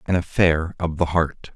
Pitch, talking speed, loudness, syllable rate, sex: 85 Hz, 195 wpm, -21 LUFS, 4.3 syllables/s, male